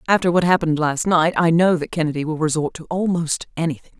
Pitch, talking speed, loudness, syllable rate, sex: 165 Hz, 210 wpm, -19 LUFS, 6.3 syllables/s, female